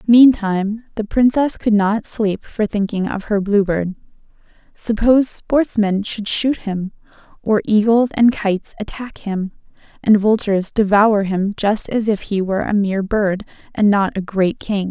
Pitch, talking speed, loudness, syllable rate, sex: 210 Hz, 160 wpm, -17 LUFS, 4.4 syllables/s, female